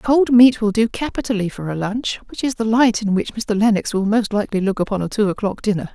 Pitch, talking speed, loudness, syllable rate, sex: 215 Hz, 250 wpm, -18 LUFS, 5.8 syllables/s, female